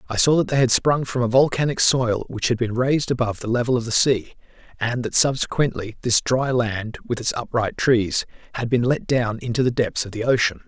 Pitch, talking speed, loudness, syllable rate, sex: 120 Hz, 225 wpm, -21 LUFS, 5.5 syllables/s, male